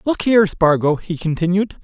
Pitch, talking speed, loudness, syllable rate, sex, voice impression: 180 Hz, 165 wpm, -17 LUFS, 5.3 syllables/s, male, very masculine, slightly middle-aged, slightly thick, slightly tensed, powerful, bright, soft, slightly clear, slightly fluent, raspy, slightly cool, intellectual, refreshing, sincere, calm, slightly mature, slightly friendly, reassuring, slightly unique, slightly elegant, wild, slightly sweet, lively, slightly strict, slightly intense, sharp, slightly light